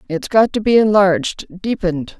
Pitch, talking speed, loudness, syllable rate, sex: 195 Hz, 165 wpm, -16 LUFS, 5.1 syllables/s, female